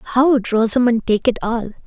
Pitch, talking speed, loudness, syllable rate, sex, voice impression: 235 Hz, 195 wpm, -17 LUFS, 4.9 syllables/s, female, gender-neutral, young, tensed, slightly powerful, bright, soft, slightly fluent, cute, intellectual, friendly, slightly sweet, lively, kind